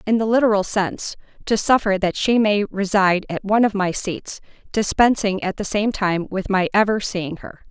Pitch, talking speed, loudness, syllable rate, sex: 200 Hz, 195 wpm, -20 LUFS, 5.1 syllables/s, female